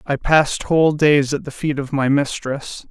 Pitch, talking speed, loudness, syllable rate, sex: 145 Hz, 205 wpm, -18 LUFS, 4.7 syllables/s, male